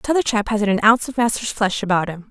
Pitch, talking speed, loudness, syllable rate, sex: 215 Hz, 260 wpm, -19 LUFS, 6.3 syllables/s, female